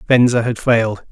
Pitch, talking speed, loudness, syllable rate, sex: 115 Hz, 160 wpm, -15 LUFS, 5.4 syllables/s, male